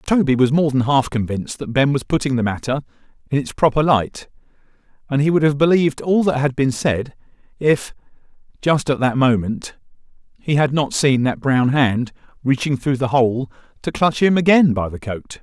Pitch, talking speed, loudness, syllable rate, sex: 135 Hz, 190 wpm, -18 LUFS, 5.1 syllables/s, male